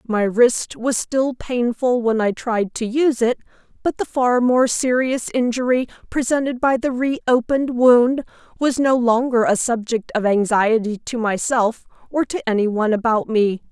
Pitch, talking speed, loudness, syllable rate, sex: 240 Hz, 160 wpm, -19 LUFS, 4.5 syllables/s, female